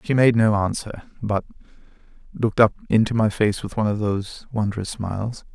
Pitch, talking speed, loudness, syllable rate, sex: 110 Hz, 175 wpm, -22 LUFS, 5.5 syllables/s, male